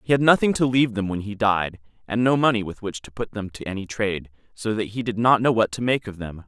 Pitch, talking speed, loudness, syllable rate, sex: 110 Hz, 285 wpm, -23 LUFS, 6.1 syllables/s, male